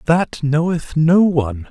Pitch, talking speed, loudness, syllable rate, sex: 155 Hz, 140 wpm, -16 LUFS, 3.9 syllables/s, male